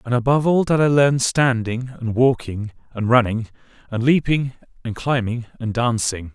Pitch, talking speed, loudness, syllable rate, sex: 120 Hz, 160 wpm, -20 LUFS, 4.8 syllables/s, male